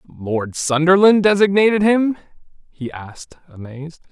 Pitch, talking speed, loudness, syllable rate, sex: 170 Hz, 100 wpm, -15 LUFS, 5.0 syllables/s, male